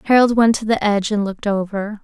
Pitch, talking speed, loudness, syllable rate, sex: 210 Hz, 235 wpm, -17 LUFS, 6.5 syllables/s, female